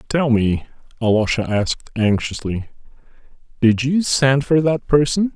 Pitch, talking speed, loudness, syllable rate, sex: 130 Hz, 125 wpm, -18 LUFS, 4.4 syllables/s, male